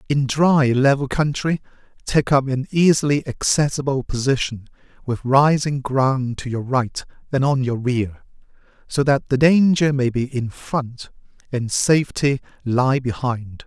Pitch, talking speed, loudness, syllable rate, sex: 135 Hz, 140 wpm, -19 LUFS, 4.1 syllables/s, male